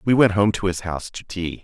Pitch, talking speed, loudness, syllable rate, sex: 95 Hz, 295 wpm, -21 LUFS, 5.9 syllables/s, male